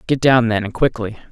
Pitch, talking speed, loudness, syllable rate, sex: 115 Hz, 230 wpm, -17 LUFS, 5.7 syllables/s, male